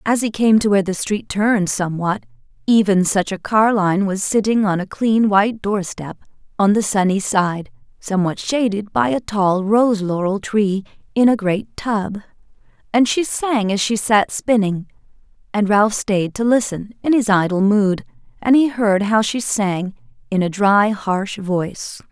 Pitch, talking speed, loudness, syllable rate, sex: 200 Hz, 175 wpm, -18 LUFS, 4.4 syllables/s, female